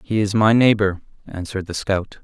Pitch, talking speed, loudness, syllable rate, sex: 100 Hz, 190 wpm, -19 LUFS, 5.3 syllables/s, male